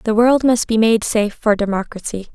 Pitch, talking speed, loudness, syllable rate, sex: 220 Hz, 205 wpm, -17 LUFS, 5.5 syllables/s, female